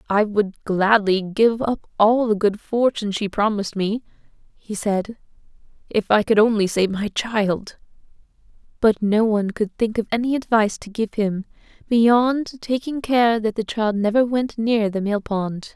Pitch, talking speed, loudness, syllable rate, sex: 215 Hz, 170 wpm, -20 LUFS, 4.4 syllables/s, female